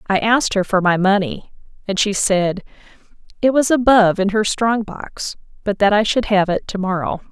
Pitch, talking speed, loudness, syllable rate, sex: 205 Hz, 195 wpm, -17 LUFS, 5.1 syllables/s, female